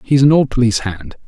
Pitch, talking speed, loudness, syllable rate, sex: 120 Hz, 235 wpm, -14 LUFS, 6.3 syllables/s, male